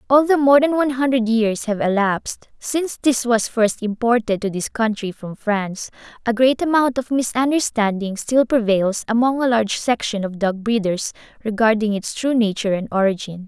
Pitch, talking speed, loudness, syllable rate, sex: 230 Hz, 170 wpm, -19 LUFS, 5.2 syllables/s, female